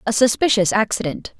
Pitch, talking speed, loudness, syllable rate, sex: 215 Hz, 130 wpm, -18 LUFS, 5.6 syllables/s, female